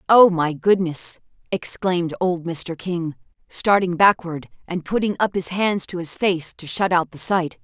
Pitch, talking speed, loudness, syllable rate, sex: 175 Hz, 175 wpm, -21 LUFS, 4.3 syllables/s, female